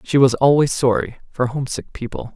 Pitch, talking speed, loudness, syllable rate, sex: 130 Hz, 180 wpm, -18 LUFS, 5.6 syllables/s, male